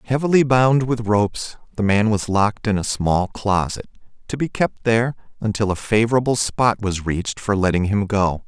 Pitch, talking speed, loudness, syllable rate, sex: 110 Hz, 185 wpm, -19 LUFS, 5.1 syllables/s, male